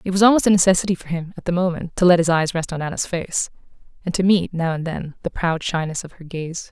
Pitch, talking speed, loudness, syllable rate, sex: 175 Hz, 270 wpm, -20 LUFS, 6.2 syllables/s, female